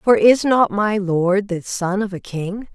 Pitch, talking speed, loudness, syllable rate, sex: 200 Hz, 220 wpm, -18 LUFS, 3.8 syllables/s, female